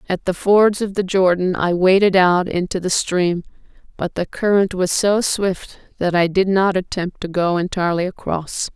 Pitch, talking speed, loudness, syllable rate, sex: 185 Hz, 185 wpm, -18 LUFS, 4.6 syllables/s, female